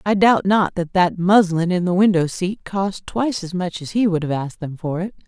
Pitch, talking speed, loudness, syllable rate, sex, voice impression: 180 Hz, 250 wpm, -19 LUFS, 5.2 syllables/s, female, feminine, adult-like, tensed, bright, slightly soft, clear, friendly, lively, sharp